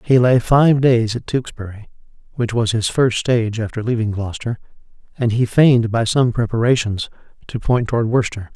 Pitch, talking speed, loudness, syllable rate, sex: 115 Hz, 170 wpm, -17 LUFS, 5.5 syllables/s, male